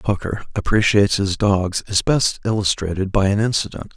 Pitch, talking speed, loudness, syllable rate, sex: 100 Hz, 150 wpm, -19 LUFS, 5.3 syllables/s, male